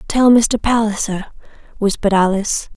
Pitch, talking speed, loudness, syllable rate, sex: 210 Hz, 110 wpm, -16 LUFS, 5.2 syllables/s, female